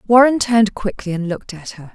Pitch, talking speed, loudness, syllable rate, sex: 205 Hz, 215 wpm, -17 LUFS, 5.8 syllables/s, female